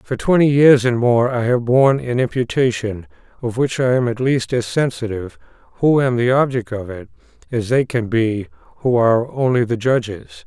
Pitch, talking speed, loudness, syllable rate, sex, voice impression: 120 Hz, 190 wpm, -17 LUFS, 5.1 syllables/s, male, very masculine, slightly old, thick, relaxed, slightly weak, dark, soft, muffled, slightly halting, cool, very intellectual, very sincere, very calm, very mature, friendly, very reassuring, very unique, elegant, slightly wild, sweet, slightly lively, very kind, modest